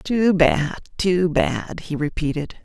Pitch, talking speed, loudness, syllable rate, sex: 170 Hz, 135 wpm, -21 LUFS, 3.4 syllables/s, female